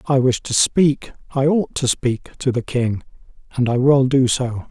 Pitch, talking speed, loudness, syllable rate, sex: 130 Hz, 205 wpm, -18 LUFS, 4.2 syllables/s, male